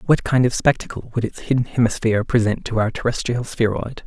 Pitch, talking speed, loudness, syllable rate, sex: 120 Hz, 190 wpm, -20 LUFS, 5.8 syllables/s, male